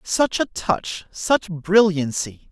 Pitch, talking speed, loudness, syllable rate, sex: 180 Hz, 120 wpm, -21 LUFS, 3.0 syllables/s, male